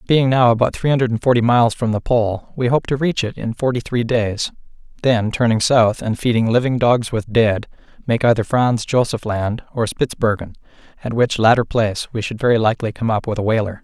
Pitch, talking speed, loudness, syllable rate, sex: 115 Hz, 210 wpm, -18 LUFS, 5.5 syllables/s, male